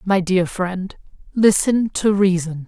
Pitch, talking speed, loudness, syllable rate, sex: 190 Hz, 135 wpm, -18 LUFS, 3.6 syllables/s, female